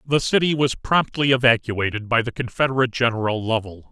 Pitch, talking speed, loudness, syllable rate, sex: 125 Hz, 155 wpm, -20 LUFS, 5.8 syllables/s, male